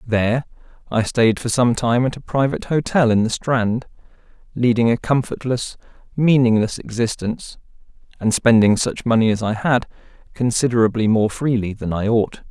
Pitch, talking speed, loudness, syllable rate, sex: 115 Hz, 150 wpm, -19 LUFS, 5.1 syllables/s, male